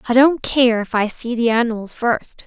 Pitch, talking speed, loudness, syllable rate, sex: 235 Hz, 220 wpm, -18 LUFS, 4.8 syllables/s, female